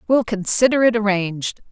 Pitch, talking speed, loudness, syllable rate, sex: 215 Hz, 140 wpm, -18 LUFS, 5.3 syllables/s, female